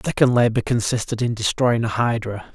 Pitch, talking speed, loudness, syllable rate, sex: 115 Hz, 190 wpm, -20 LUFS, 5.7 syllables/s, male